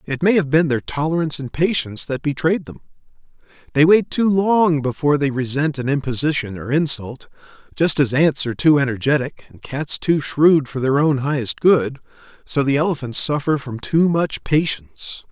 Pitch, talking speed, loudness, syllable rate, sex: 145 Hz, 175 wpm, -18 LUFS, 5.1 syllables/s, male